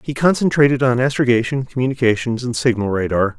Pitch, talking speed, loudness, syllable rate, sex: 125 Hz, 140 wpm, -17 LUFS, 6.1 syllables/s, male